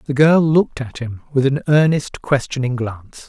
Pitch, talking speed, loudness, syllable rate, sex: 135 Hz, 185 wpm, -17 LUFS, 5.1 syllables/s, male